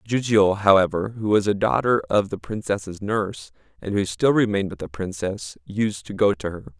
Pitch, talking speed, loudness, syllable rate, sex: 100 Hz, 195 wpm, -22 LUFS, 5.0 syllables/s, male